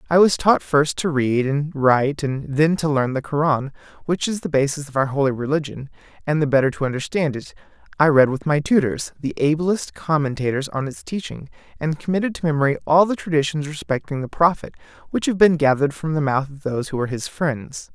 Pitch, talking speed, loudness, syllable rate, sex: 150 Hz, 205 wpm, -20 LUFS, 5.7 syllables/s, male